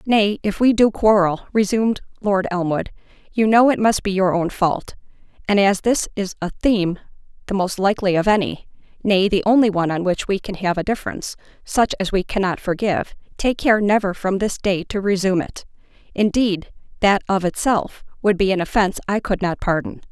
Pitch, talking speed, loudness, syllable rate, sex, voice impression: 200 Hz, 190 wpm, -19 LUFS, 5.2 syllables/s, female, feminine, adult-like, tensed, powerful, clear, fluent, intellectual, calm, elegant, lively, strict